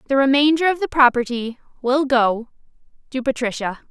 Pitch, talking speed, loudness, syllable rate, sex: 260 Hz, 140 wpm, -19 LUFS, 5.3 syllables/s, female